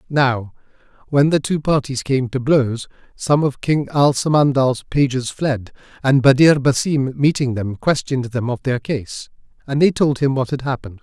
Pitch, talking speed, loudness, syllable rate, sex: 135 Hz, 175 wpm, -18 LUFS, 4.6 syllables/s, male